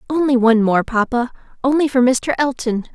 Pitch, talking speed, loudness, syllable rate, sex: 250 Hz, 165 wpm, -17 LUFS, 5.6 syllables/s, female